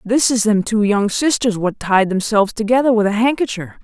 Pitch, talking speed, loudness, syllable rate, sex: 220 Hz, 205 wpm, -16 LUFS, 5.5 syllables/s, female